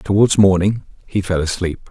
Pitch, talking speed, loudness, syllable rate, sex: 95 Hz, 160 wpm, -17 LUFS, 4.8 syllables/s, male